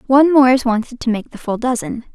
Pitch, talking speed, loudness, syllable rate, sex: 245 Hz, 250 wpm, -16 LUFS, 6.3 syllables/s, female